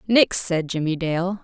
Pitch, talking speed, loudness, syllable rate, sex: 180 Hz, 165 wpm, -21 LUFS, 3.9 syllables/s, female